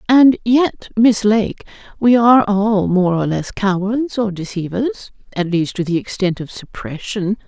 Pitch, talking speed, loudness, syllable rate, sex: 205 Hz, 150 wpm, -16 LUFS, 4.2 syllables/s, female